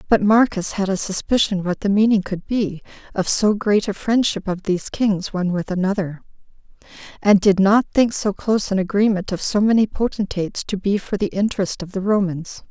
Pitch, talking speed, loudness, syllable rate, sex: 200 Hz, 195 wpm, -19 LUFS, 5.4 syllables/s, female